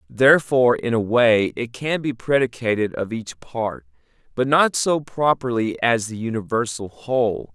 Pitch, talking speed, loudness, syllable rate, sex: 120 Hz, 150 wpm, -20 LUFS, 4.5 syllables/s, male